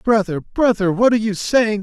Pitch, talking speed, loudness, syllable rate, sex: 210 Hz, 200 wpm, -17 LUFS, 5.0 syllables/s, male